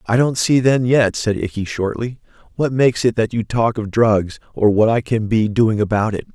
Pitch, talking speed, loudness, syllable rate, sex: 115 Hz, 225 wpm, -17 LUFS, 4.9 syllables/s, male